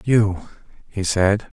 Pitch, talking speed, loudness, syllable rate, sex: 100 Hz, 115 wpm, -20 LUFS, 3.0 syllables/s, male